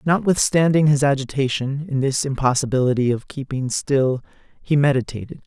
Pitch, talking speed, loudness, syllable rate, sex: 140 Hz, 120 wpm, -20 LUFS, 5.3 syllables/s, male